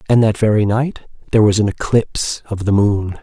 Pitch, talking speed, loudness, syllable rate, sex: 105 Hz, 205 wpm, -16 LUFS, 5.6 syllables/s, male